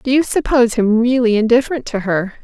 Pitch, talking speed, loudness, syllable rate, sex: 235 Hz, 195 wpm, -15 LUFS, 6.0 syllables/s, female